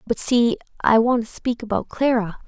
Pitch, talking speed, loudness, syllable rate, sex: 230 Hz, 195 wpm, -20 LUFS, 4.9 syllables/s, female